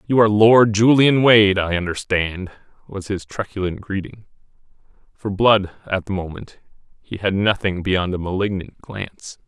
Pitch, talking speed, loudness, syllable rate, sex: 100 Hz, 145 wpm, -18 LUFS, 4.7 syllables/s, male